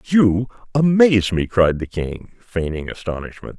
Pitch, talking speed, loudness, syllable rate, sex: 105 Hz, 135 wpm, -19 LUFS, 4.5 syllables/s, male